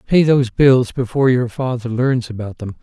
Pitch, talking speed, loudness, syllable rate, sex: 125 Hz, 190 wpm, -16 LUFS, 5.3 syllables/s, male